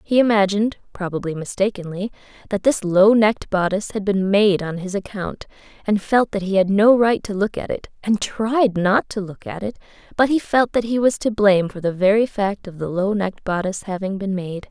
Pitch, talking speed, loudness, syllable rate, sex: 200 Hz, 215 wpm, -20 LUFS, 5.4 syllables/s, female